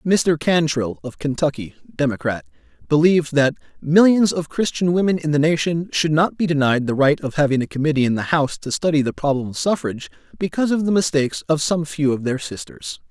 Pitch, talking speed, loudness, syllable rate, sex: 155 Hz, 195 wpm, -19 LUFS, 5.7 syllables/s, male